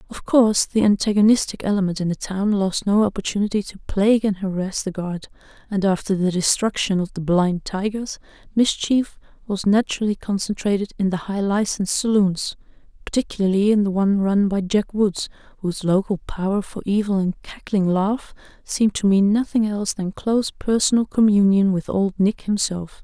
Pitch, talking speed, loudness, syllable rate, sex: 200 Hz, 160 wpm, -20 LUFS, 5.3 syllables/s, female